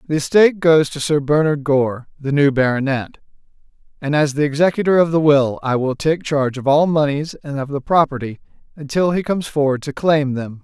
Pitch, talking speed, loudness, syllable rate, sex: 145 Hz, 195 wpm, -17 LUFS, 5.5 syllables/s, male